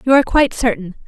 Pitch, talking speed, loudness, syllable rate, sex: 240 Hz, 225 wpm, -15 LUFS, 7.9 syllables/s, female